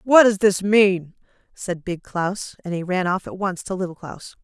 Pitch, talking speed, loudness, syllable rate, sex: 190 Hz, 215 wpm, -21 LUFS, 4.4 syllables/s, female